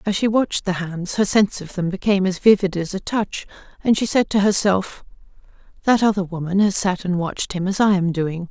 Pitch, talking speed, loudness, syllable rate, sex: 190 Hz, 225 wpm, -20 LUFS, 5.7 syllables/s, female